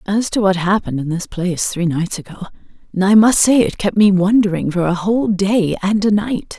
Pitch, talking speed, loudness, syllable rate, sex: 195 Hz, 220 wpm, -16 LUFS, 5.3 syllables/s, female